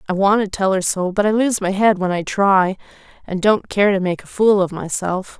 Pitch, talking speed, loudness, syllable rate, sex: 195 Hz, 255 wpm, -18 LUFS, 5.1 syllables/s, female